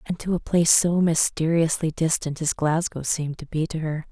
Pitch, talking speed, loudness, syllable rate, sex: 160 Hz, 205 wpm, -22 LUFS, 5.3 syllables/s, female